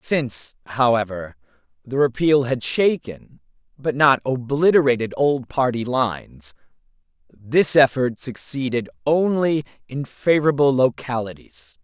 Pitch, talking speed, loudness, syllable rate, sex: 135 Hz, 95 wpm, -20 LUFS, 4.3 syllables/s, male